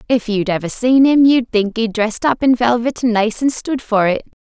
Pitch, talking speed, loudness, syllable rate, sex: 235 Hz, 240 wpm, -15 LUFS, 5.2 syllables/s, female